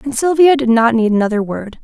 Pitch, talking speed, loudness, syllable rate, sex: 245 Hz, 230 wpm, -13 LUFS, 5.9 syllables/s, female